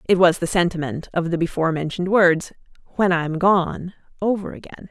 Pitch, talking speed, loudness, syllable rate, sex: 175 Hz, 170 wpm, -20 LUFS, 5.4 syllables/s, female